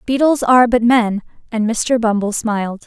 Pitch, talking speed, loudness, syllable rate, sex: 230 Hz, 170 wpm, -15 LUFS, 4.9 syllables/s, female